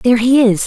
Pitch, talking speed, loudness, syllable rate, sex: 230 Hz, 270 wpm, -12 LUFS, 7.0 syllables/s, female